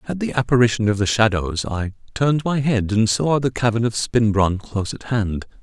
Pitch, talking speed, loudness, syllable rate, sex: 115 Hz, 205 wpm, -20 LUFS, 5.2 syllables/s, male